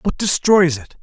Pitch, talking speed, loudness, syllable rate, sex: 170 Hz, 175 wpm, -16 LUFS, 4.2 syllables/s, male